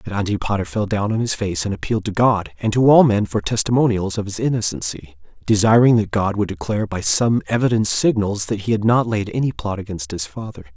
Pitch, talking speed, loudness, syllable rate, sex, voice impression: 105 Hz, 215 wpm, -19 LUFS, 5.9 syllables/s, male, masculine, adult-like, slightly soft, cool, sincere, slightly calm, slightly kind